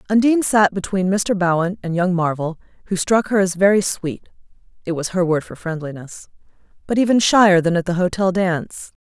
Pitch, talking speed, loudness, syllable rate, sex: 185 Hz, 185 wpm, -18 LUFS, 4.7 syllables/s, female